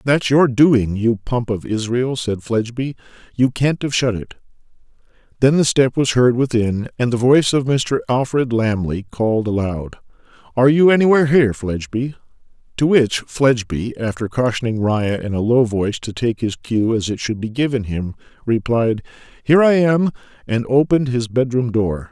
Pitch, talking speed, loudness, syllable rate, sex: 120 Hz, 170 wpm, -18 LUFS, 5.1 syllables/s, male